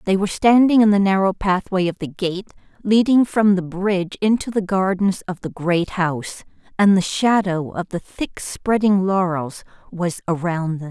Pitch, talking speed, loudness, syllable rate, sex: 190 Hz, 175 wpm, -19 LUFS, 4.7 syllables/s, female